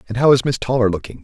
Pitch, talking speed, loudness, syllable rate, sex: 120 Hz, 290 wpm, -17 LUFS, 7.6 syllables/s, male